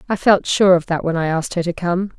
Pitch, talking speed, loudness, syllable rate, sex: 175 Hz, 300 wpm, -17 LUFS, 6.0 syllables/s, female